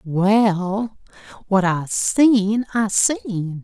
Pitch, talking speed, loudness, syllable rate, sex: 205 Hz, 100 wpm, -19 LUFS, 2.4 syllables/s, female